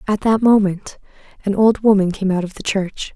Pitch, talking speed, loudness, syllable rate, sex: 200 Hz, 210 wpm, -17 LUFS, 5.1 syllables/s, female